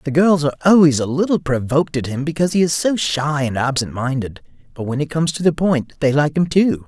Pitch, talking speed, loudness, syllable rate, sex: 150 Hz, 245 wpm, -17 LUFS, 6.0 syllables/s, male